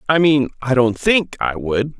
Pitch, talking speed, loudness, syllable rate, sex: 135 Hz, 210 wpm, -17 LUFS, 4.3 syllables/s, male